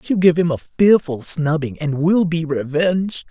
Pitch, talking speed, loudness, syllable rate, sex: 160 Hz, 180 wpm, -18 LUFS, 4.7 syllables/s, male